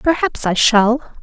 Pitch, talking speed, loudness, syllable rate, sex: 245 Hz, 145 wpm, -15 LUFS, 3.8 syllables/s, female